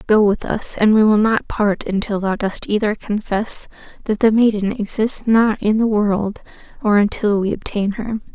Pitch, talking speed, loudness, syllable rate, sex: 210 Hz, 185 wpm, -18 LUFS, 4.6 syllables/s, female